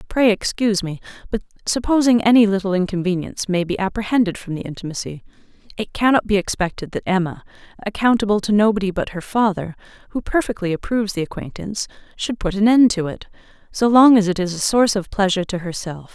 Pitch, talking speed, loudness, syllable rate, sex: 200 Hz, 180 wpm, -19 LUFS, 6.3 syllables/s, female